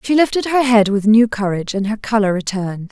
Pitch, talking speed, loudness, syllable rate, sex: 220 Hz, 225 wpm, -16 LUFS, 5.9 syllables/s, female